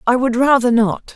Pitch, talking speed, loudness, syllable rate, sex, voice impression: 245 Hz, 210 wpm, -15 LUFS, 5.0 syllables/s, female, very feminine, slightly young, slightly adult-like, slightly thin, tensed, slightly weak, slightly dark, very hard, clear, fluent, slightly cute, cool, intellectual, slightly refreshing, sincere, very calm, friendly, reassuring, slightly unique, elegant, slightly wild, slightly sweet, slightly lively, strict, slightly intense, slightly sharp